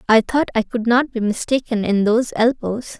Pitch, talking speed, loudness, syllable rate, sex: 230 Hz, 200 wpm, -18 LUFS, 5.2 syllables/s, female